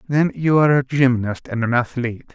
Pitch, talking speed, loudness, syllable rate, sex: 130 Hz, 205 wpm, -19 LUFS, 5.6 syllables/s, male